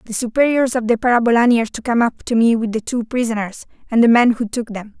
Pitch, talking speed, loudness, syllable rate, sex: 230 Hz, 250 wpm, -17 LUFS, 6.5 syllables/s, female